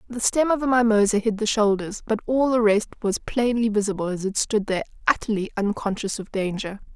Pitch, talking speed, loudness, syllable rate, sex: 215 Hz, 200 wpm, -23 LUFS, 5.8 syllables/s, female